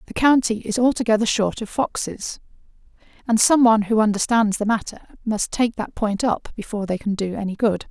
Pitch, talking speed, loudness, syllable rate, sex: 215 Hz, 190 wpm, -20 LUFS, 5.7 syllables/s, female